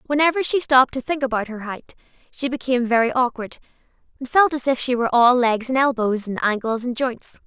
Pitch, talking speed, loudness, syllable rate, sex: 250 Hz, 210 wpm, -20 LUFS, 5.9 syllables/s, female